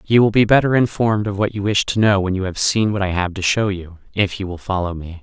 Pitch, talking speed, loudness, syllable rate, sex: 100 Hz, 300 wpm, -18 LUFS, 6.1 syllables/s, male